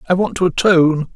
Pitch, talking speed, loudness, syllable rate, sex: 175 Hz, 205 wpm, -15 LUFS, 6.2 syllables/s, male